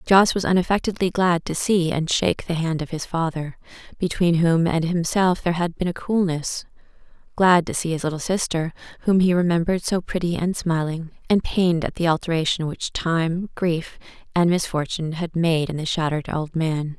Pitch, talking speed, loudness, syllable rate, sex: 170 Hz, 180 wpm, -22 LUFS, 5.3 syllables/s, female